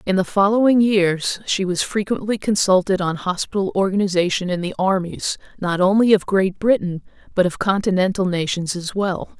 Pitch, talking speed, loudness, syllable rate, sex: 190 Hz, 160 wpm, -19 LUFS, 5.1 syllables/s, female